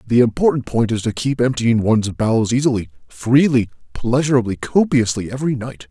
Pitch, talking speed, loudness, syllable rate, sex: 120 Hz, 150 wpm, -18 LUFS, 5.6 syllables/s, male